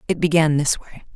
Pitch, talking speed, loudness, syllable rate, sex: 155 Hz, 205 wpm, -19 LUFS, 5.5 syllables/s, female